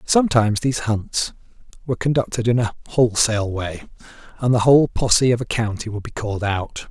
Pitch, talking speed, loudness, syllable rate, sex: 115 Hz, 175 wpm, -20 LUFS, 6.0 syllables/s, male